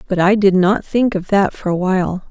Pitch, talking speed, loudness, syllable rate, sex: 190 Hz, 260 wpm, -16 LUFS, 5.3 syllables/s, female